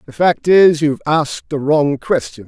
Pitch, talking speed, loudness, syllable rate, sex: 145 Hz, 195 wpm, -15 LUFS, 4.9 syllables/s, male